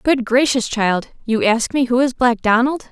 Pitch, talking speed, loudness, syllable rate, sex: 240 Hz, 205 wpm, -17 LUFS, 4.6 syllables/s, female